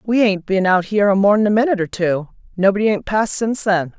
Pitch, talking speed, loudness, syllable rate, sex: 200 Hz, 225 wpm, -17 LUFS, 6.4 syllables/s, female